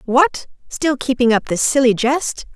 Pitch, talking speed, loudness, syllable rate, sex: 260 Hz, 165 wpm, -17 LUFS, 4.2 syllables/s, female